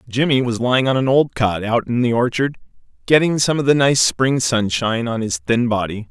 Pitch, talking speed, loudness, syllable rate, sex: 120 Hz, 215 wpm, -17 LUFS, 5.3 syllables/s, male